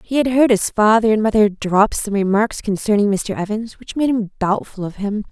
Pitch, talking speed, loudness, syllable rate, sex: 215 Hz, 215 wpm, -17 LUFS, 5.1 syllables/s, female